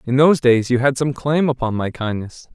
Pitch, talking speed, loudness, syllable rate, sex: 130 Hz, 235 wpm, -18 LUFS, 5.4 syllables/s, male